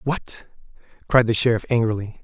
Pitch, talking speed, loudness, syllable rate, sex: 115 Hz, 135 wpm, -20 LUFS, 5.2 syllables/s, male